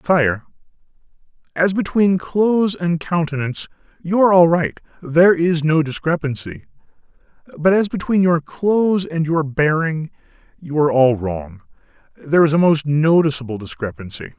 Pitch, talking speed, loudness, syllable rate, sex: 160 Hz, 135 wpm, -17 LUFS, 5.0 syllables/s, male